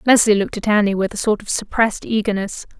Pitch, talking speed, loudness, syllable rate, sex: 205 Hz, 215 wpm, -18 LUFS, 6.6 syllables/s, female